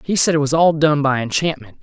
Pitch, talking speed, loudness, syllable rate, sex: 150 Hz, 260 wpm, -16 LUFS, 5.8 syllables/s, male